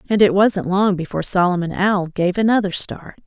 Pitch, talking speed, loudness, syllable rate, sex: 190 Hz, 185 wpm, -18 LUFS, 5.4 syllables/s, female